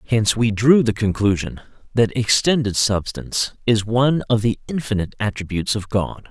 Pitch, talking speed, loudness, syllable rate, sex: 110 Hz, 150 wpm, -19 LUFS, 5.5 syllables/s, male